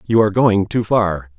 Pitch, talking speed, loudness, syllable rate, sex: 105 Hz, 215 wpm, -16 LUFS, 4.9 syllables/s, male